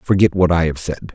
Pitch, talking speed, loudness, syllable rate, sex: 85 Hz, 265 wpm, -17 LUFS, 5.4 syllables/s, male